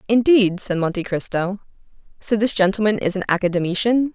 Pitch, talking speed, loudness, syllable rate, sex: 200 Hz, 145 wpm, -19 LUFS, 5.7 syllables/s, female